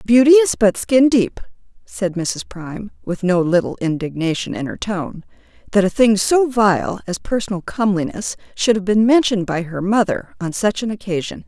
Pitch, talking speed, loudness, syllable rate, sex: 200 Hz, 180 wpm, -18 LUFS, 5.0 syllables/s, female